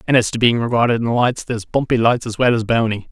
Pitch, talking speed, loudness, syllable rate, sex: 115 Hz, 270 wpm, -17 LUFS, 6.4 syllables/s, male